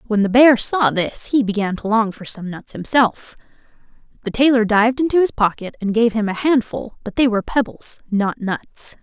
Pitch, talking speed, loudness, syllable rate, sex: 225 Hz, 200 wpm, -18 LUFS, 5.1 syllables/s, female